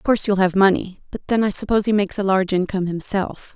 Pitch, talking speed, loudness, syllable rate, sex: 195 Hz, 255 wpm, -20 LUFS, 7.0 syllables/s, female